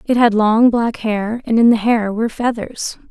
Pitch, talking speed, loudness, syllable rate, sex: 225 Hz, 215 wpm, -16 LUFS, 4.6 syllables/s, female